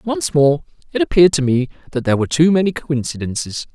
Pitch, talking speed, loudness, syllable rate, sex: 150 Hz, 190 wpm, -17 LUFS, 6.4 syllables/s, male